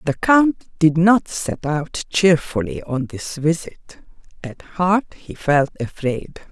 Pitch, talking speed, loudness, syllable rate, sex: 165 Hz, 140 wpm, -19 LUFS, 3.5 syllables/s, female